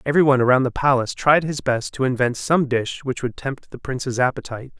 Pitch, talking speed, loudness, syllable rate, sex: 130 Hz, 225 wpm, -20 LUFS, 6.3 syllables/s, male